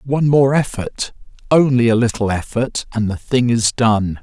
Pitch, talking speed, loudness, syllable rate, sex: 120 Hz, 170 wpm, -17 LUFS, 4.6 syllables/s, male